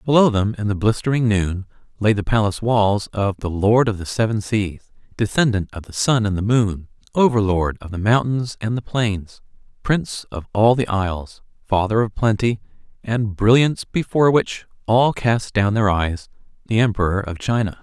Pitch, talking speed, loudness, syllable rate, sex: 105 Hz, 175 wpm, -19 LUFS, 5.0 syllables/s, male